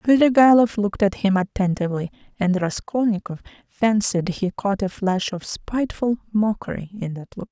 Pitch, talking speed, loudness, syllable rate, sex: 205 Hz, 145 wpm, -21 LUFS, 5.1 syllables/s, female